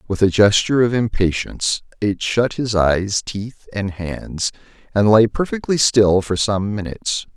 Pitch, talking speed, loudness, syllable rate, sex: 105 Hz, 155 wpm, -18 LUFS, 4.4 syllables/s, male